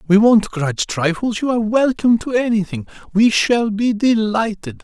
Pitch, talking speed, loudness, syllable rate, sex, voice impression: 215 Hz, 150 wpm, -17 LUFS, 5.0 syllables/s, male, masculine, middle-aged, tensed, powerful, clear, fluent, slightly raspy, intellectual, friendly, wild, lively, slightly strict